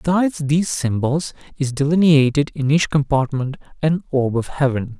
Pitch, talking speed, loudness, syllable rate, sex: 145 Hz, 145 wpm, -19 LUFS, 5.2 syllables/s, male